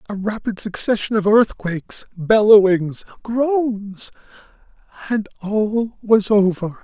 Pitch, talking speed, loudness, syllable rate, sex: 210 Hz, 70 wpm, -18 LUFS, 3.7 syllables/s, male